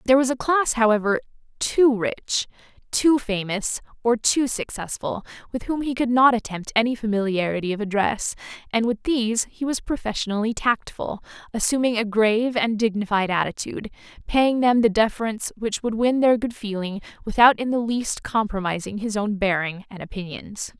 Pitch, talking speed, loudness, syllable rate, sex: 225 Hz, 160 wpm, -22 LUFS, 5.3 syllables/s, female